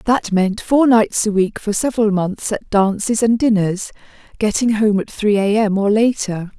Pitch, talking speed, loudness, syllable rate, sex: 210 Hz, 190 wpm, -17 LUFS, 4.5 syllables/s, female